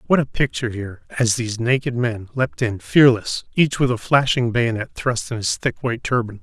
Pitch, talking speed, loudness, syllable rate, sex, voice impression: 115 Hz, 205 wpm, -20 LUFS, 5.5 syllables/s, male, very masculine, middle-aged, very thick, slightly tensed, very powerful, bright, soft, clear, fluent, slightly raspy, cool, very intellectual, refreshing, very sincere, very calm, friendly, very reassuring, unique, slightly elegant, wild, very sweet, lively, kind, slightly intense